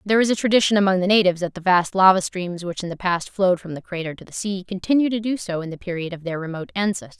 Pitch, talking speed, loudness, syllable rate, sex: 185 Hz, 285 wpm, -21 LUFS, 7.1 syllables/s, female